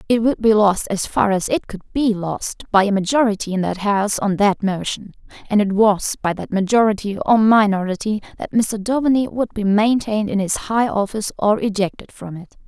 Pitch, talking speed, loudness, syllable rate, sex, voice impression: 210 Hz, 200 wpm, -18 LUFS, 5.3 syllables/s, female, feminine, slightly adult-like, fluent, cute, slightly calm, friendly, kind